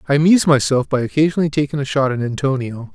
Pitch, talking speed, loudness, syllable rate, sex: 140 Hz, 205 wpm, -17 LUFS, 7.3 syllables/s, male